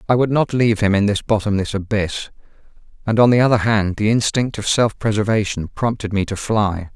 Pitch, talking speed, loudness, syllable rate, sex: 105 Hz, 200 wpm, -18 LUFS, 5.5 syllables/s, male